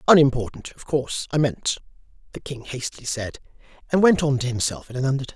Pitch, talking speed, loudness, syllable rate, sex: 135 Hz, 190 wpm, -23 LUFS, 6.6 syllables/s, male